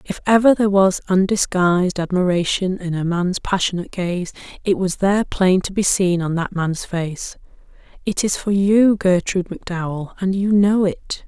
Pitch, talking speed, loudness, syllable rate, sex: 185 Hz, 170 wpm, -19 LUFS, 4.8 syllables/s, female